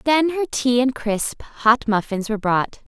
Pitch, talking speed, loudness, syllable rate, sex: 240 Hz, 185 wpm, -20 LUFS, 4.2 syllables/s, female